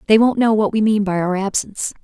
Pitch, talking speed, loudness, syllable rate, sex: 210 Hz, 265 wpm, -17 LUFS, 6.2 syllables/s, female